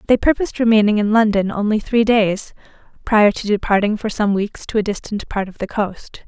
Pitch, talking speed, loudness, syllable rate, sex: 210 Hz, 200 wpm, -17 LUFS, 5.4 syllables/s, female